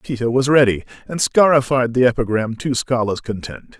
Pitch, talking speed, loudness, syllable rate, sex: 125 Hz, 160 wpm, -17 LUFS, 5.4 syllables/s, male